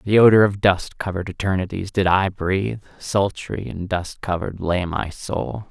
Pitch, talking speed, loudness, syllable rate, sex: 95 Hz, 170 wpm, -21 LUFS, 4.7 syllables/s, male